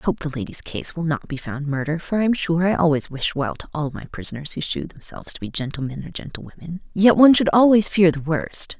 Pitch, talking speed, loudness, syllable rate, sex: 165 Hz, 250 wpm, -21 LUFS, 5.9 syllables/s, female